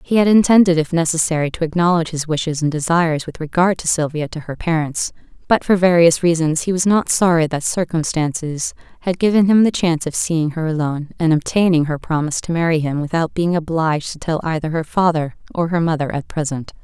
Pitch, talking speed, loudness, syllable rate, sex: 165 Hz, 205 wpm, -17 LUFS, 5.9 syllables/s, female